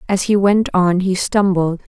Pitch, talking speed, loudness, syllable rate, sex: 190 Hz, 185 wpm, -16 LUFS, 4.2 syllables/s, female